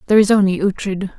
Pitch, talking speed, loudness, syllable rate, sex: 195 Hz, 205 wpm, -16 LUFS, 6.9 syllables/s, female